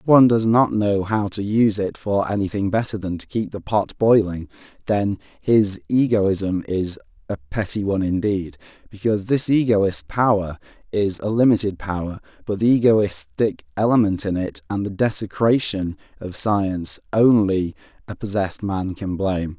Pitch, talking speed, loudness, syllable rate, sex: 100 Hz, 155 wpm, -20 LUFS, 4.8 syllables/s, male